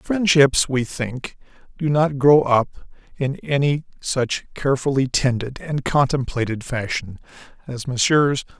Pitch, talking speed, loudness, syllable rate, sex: 135 Hz, 120 wpm, -20 LUFS, 3.8 syllables/s, male